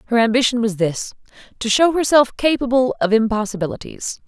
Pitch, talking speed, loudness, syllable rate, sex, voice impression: 235 Hz, 125 wpm, -18 LUFS, 5.8 syllables/s, female, feminine, adult-like, tensed, powerful, slightly hard, clear, fluent, intellectual, calm, elegant, lively, sharp